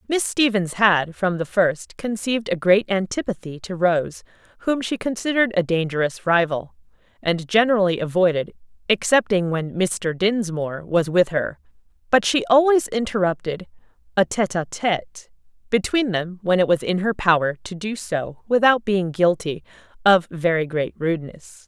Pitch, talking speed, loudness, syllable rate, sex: 190 Hz, 150 wpm, -21 LUFS, 4.8 syllables/s, female